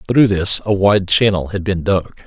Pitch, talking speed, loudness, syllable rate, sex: 95 Hz, 210 wpm, -15 LUFS, 4.6 syllables/s, male